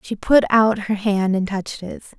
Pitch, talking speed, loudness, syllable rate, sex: 205 Hz, 220 wpm, -18 LUFS, 4.8 syllables/s, female